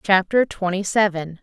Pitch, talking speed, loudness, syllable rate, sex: 190 Hz, 125 wpm, -20 LUFS, 4.5 syllables/s, female